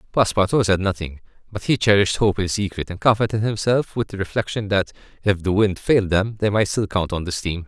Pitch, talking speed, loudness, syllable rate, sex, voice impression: 100 Hz, 220 wpm, -20 LUFS, 6.1 syllables/s, male, masculine, adult-like, slightly clear, fluent, refreshing, sincere, slightly elegant